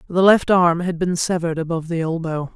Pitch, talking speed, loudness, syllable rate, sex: 170 Hz, 210 wpm, -19 LUFS, 5.9 syllables/s, female